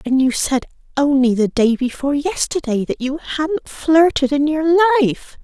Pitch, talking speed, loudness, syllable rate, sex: 285 Hz, 165 wpm, -17 LUFS, 4.2 syllables/s, female